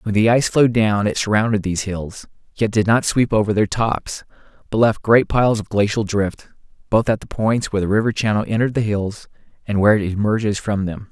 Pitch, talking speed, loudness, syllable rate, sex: 105 Hz, 215 wpm, -18 LUFS, 5.9 syllables/s, male